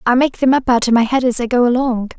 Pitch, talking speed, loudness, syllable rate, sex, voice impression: 245 Hz, 330 wpm, -15 LUFS, 6.5 syllables/s, female, feminine, adult-like, slightly thin, tensed, slightly weak, soft, intellectual, calm, friendly, reassuring, elegant, kind, modest